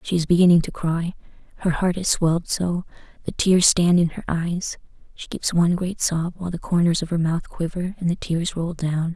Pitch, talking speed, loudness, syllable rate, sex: 170 Hz, 215 wpm, -22 LUFS, 5.4 syllables/s, female